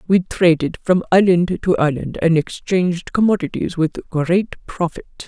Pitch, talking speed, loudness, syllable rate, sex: 175 Hz, 135 wpm, -18 LUFS, 4.4 syllables/s, female